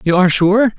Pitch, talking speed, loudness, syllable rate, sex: 195 Hz, 230 wpm, -12 LUFS, 6.0 syllables/s, male